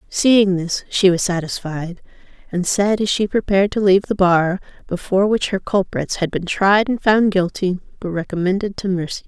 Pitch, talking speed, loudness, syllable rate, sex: 190 Hz, 180 wpm, -18 LUFS, 5.1 syllables/s, female